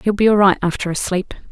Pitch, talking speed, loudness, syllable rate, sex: 195 Hz, 280 wpm, -17 LUFS, 6.2 syllables/s, female